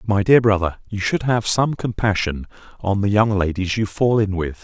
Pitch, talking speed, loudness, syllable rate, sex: 100 Hz, 205 wpm, -19 LUFS, 4.9 syllables/s, male